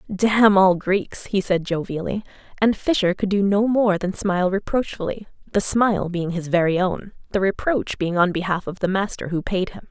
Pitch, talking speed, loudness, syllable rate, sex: 190 Hz, 195 wpm, -21 LUFS, 5.0 syllables/s, female